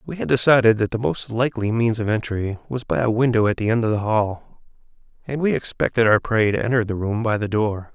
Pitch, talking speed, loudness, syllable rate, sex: 115 Hz, 240 wpm, -20 LUFS, 5.8 syllables/s, male